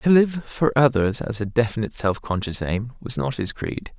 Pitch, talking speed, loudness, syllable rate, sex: 120 Hz, 210 wpm, -23 LUFS, 5.0 syllables/s, male